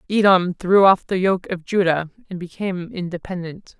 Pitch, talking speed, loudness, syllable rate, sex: 185 Hz, 160 wpm, -19 LUFS, 5.0 syllables/s, female